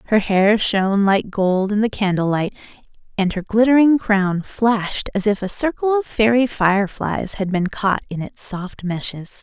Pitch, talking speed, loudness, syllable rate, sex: 205 Hz, 170 wpm, -19 LUFS, 4.5 syllables/s, female